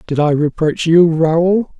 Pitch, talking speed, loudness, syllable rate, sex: 165 Hz, 170 wpm, -14 LUFS, 3.7 syllables/s, male